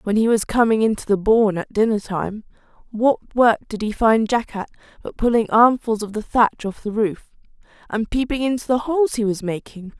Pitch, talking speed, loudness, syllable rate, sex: 225 Hz, 205 wpm, -20 LUFS, 5.1 syllables/s, female